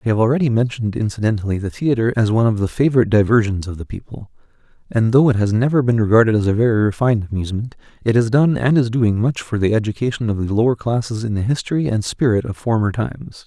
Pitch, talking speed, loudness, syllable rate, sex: 115 Hz, 225 wpm, -18 LUFS, 6.8 syllables/s, male